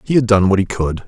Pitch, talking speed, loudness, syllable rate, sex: 105 Hz, 335 wpm, -15 LUFS, 6.2 syllables/s, male